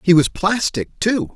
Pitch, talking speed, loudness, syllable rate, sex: 180 Hz, 180 wpm, -18 LUFS, 4.1 syllables/s, male